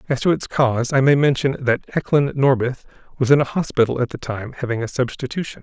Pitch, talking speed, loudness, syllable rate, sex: 130 Hz, 215 wpm, -19 LUFS, 5.9 syllables/s, male